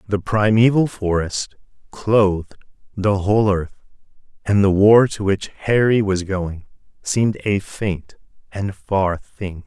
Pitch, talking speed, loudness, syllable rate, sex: 100 Hz, 130 wpm, -19 LUFS, 3.8 syllables/s, male